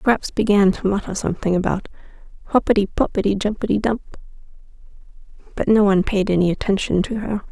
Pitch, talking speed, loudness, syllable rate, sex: 200 Hz, 145 wpm, -19 LUFS, 6.2 syllables/s, female